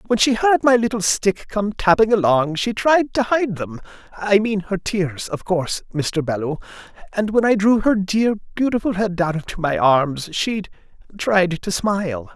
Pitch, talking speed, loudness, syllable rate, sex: 195 Hz, 175 wpm, -19 LUFS, 4.6 syllables/s, male